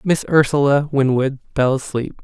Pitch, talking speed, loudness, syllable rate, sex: 140 Hz, 135 wpm, -17 LUFS, 4.7 syllables/s, male